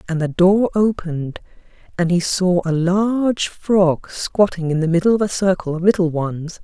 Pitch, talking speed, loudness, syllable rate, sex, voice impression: 180 Hz, 180 wpm, -18 LUFS, 4.7 syllables/s, female, feminine, very adult-like, slightly fluent, unique, slightly intense